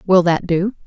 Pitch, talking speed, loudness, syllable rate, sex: 185 Hz, 210 wpm, -17 LUFS, 4.7 syllables/s, female